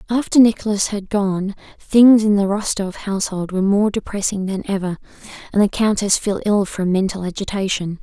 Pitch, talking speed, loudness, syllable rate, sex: 200 Hz, 165 wpm, -18 LUFS, 5.2 syllables/s, female